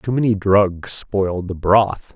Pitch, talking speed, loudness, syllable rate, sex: 100 Hz, 165 wpm, -18 LUFS, 3.3 syllables/s, male